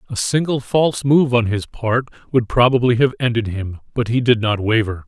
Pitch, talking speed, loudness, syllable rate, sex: 120 Hz, 200 wpm, -18 LUFS, 5.3 syllables/s, male